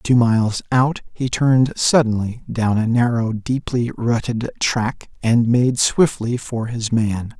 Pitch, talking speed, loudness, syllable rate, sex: 120 Hz, 145 wpm, -19 LUFS, 3.8 syllables/s, male